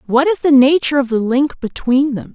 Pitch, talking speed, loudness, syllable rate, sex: 270 Hz, 230 wpm, -14 LUFS, 5.5 syllables/s, female